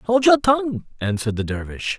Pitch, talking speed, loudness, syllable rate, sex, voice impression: 175 Hz, 180 wpm, -20 LUFS, 5.5 syllables/s, male, masculine, very adult-like, powerful, slightly unique, slightly intense